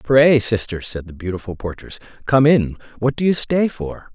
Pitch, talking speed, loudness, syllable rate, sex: 115 Hz, 190 wpm, -19 LUFS, 4.8 syllables/s, male